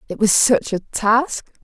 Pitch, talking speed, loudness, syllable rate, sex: 225 Hz, 185 wpm, -17 LUFS, 3.7 syllables/s, female